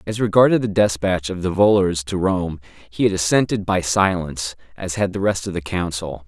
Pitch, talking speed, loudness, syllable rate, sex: 95 Hz, 200 wpm, -19 LUFS, 5.2 syllables/s, male